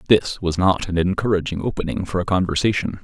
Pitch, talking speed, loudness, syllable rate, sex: 95 Hz, 180 wpm, -21 LUFS, 6.0 syllables/s, male